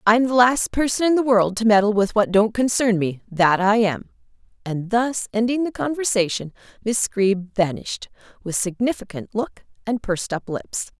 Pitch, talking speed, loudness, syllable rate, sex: 215 Hz, 175 wpm, -20 LUFS, 5.0 syllables/s, female